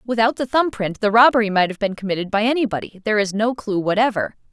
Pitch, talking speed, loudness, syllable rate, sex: 215 Hz, 225 wpm, -19 LUFS, 6.6 syllables/s, female